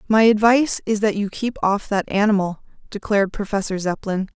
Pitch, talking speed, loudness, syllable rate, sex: 205 Hz, 165 wpm, -20 LUFS, 5.5 syllables/s, female